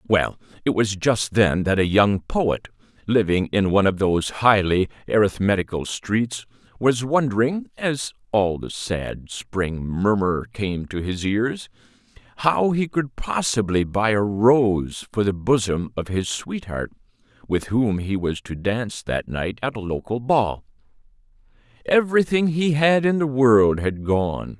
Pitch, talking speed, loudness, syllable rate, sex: 110 Hz, 150 wpm, -21 LUFS, 4.1 syllables/s, male